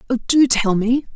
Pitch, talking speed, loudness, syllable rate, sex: 240 Hz, 205 wpm, -17 LUFS, 4.5 syllables/s, female